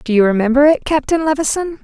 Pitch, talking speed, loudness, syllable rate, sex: 280 Hz, 195 wpm, -14 LUFS, 6.2 syllables/s, female